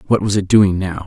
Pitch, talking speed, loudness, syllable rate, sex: 95 Hz, 280 wpm, -15 LUFS, 4.9 syllables/s, male